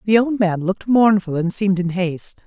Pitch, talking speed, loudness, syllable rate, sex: 195 Hz, 220 wpm, -18 LUFS, 5.8 syllables/s, female